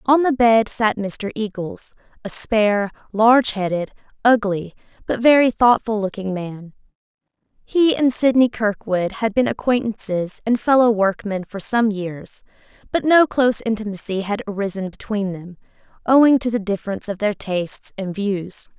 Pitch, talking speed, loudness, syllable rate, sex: 215 Hz, 145 wpm, -19 LUFS, 4.7 syllables/s, female